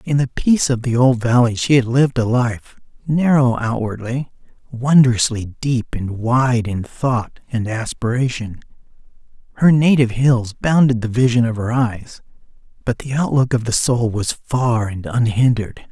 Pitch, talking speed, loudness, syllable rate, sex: 120 Hz, 155 wpm, -17 LUFS, 4.5 syllables/s, male